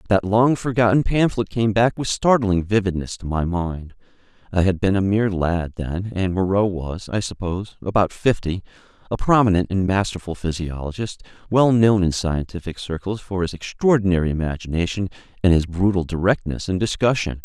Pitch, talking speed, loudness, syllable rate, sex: 95 Hz, 150 wpm, -21 LUFS, 5.3 syllables/s, male